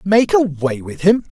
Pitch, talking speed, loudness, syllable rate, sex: 170 Hz, 175 wpm, -16 LUFS, 4.2 syllables/s, male